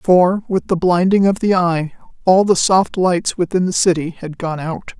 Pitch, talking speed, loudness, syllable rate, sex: 180 Hz, 205 wpm, -16 LUFS, 4.5 syllables/s, female